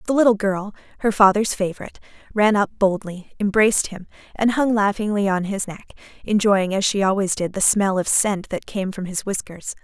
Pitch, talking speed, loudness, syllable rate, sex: 200 Hz, 190 wpm, -20 LUFS, 5.3 syllables/s, female